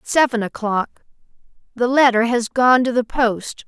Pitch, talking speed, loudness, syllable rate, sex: 240 Hz, 130 wpm, -18 LUFS, 4.3 syllables/s, female